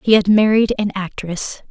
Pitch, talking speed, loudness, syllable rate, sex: 200 Hz, 175 wpm, -17 LUFS, 4.8 syllables/s, female